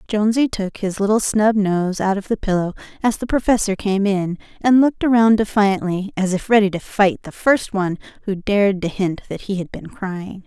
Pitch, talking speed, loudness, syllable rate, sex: 200 Hz, 205 wpm, -19 LUFS, 5.2 syllables/s, female